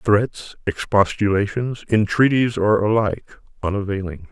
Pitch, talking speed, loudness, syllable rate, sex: 105 Hz, 85 wpm, -20 LUFS, 4.8 syllables/s, male